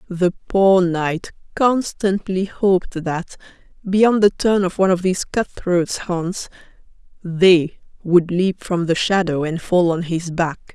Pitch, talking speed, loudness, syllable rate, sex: 180 Hz, 150 wpm, -18 LUFS, 3.8 syllables/s, female